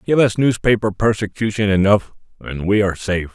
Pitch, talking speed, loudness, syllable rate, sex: 105 Hz, 160 wpm, -17 LUFS, 5.8 syllables/s, male